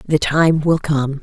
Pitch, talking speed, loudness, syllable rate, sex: 150 Hz, 195 wpm, -16 LUFS, 3.5 syllables/s, female